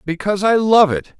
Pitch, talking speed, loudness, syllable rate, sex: 190 Hz, 200 wpm, -15 LUFS, 5.5 syllables/s, male